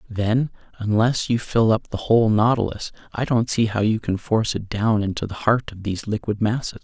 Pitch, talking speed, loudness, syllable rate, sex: 110 Hz, 210 wpm, -21 LUFS, 5.4 syllables/s, male